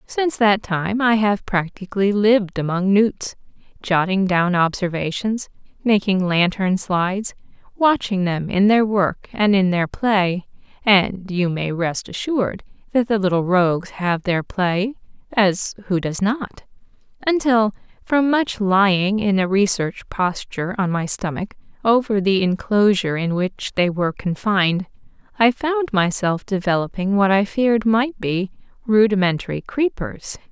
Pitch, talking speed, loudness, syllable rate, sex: 200 Hz, 135 wpm, -19 LUFS, 4.6 syllables/s, female